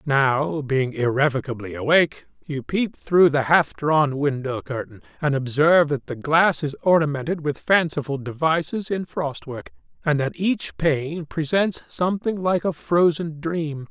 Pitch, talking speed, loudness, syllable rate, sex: 150 Hz, 150 wpm, -22 LUFS, 4.3 syllables/s, male